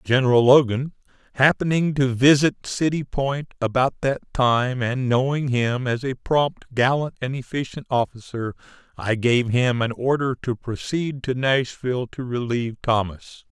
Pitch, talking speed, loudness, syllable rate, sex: 130 Hz, 140 wpm, -22 LUFS, 4.4 syllables/s, male